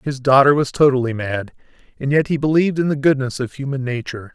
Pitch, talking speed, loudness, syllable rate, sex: 135 Hz, 195 wpm, -18 LUFS, 6.3 syllables/s, male